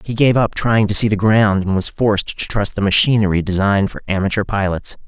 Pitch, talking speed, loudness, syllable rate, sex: 105 Hz, 225 wpm, -16 LUFS, 5.7 syllables/s, male